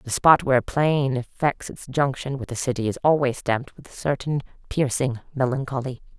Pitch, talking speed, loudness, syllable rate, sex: 130 Hz, 185 wpm, -23 LUFS, 5.4 syllables/s, female